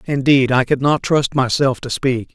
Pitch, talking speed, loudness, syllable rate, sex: 135 Hz, 205 wpm, -16 LUFS, 4.5 syllables/s, male